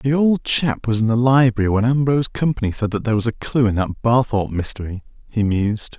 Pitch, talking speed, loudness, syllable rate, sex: 115 Hz, 220 wpm, -18 LUFS, 6.0 syllables/s, male